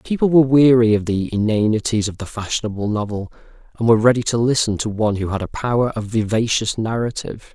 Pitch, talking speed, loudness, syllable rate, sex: 110 Hz, 190 wpm, -18 LUFS, 6.3 syllables/s, male